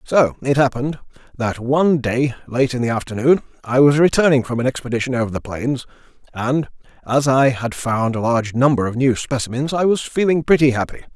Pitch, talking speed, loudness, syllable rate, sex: 130 Hz, 190 wpm, -18 LUFS, 5.7 syllables/s, male